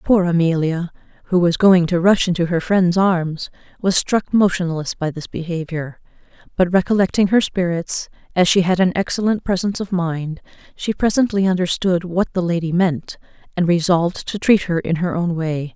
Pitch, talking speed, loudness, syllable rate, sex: 180 Hz, 175 wpm, -18 LUFS, 5.0 syllables/s, female